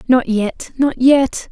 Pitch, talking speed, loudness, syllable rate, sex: 250 Hz, 160 wpm, -15 LUFS, 3.1 syllables/s, female